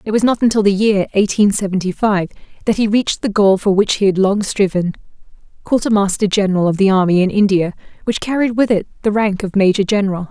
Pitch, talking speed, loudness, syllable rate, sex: 200 Hz, 205 wpm, -15 LUFS, 6.2 syllables/s, female